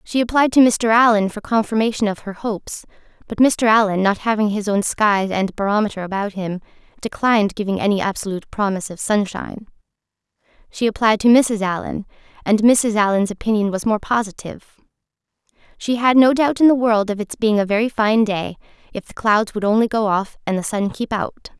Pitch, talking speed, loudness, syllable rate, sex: 215 Hz, 185 wpm, -18 LUFS, 5.6 syllables/s, female